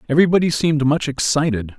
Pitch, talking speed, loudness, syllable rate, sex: 145 Hz, 135 wpm, -17 LUFS, 6.9 syllables/s, male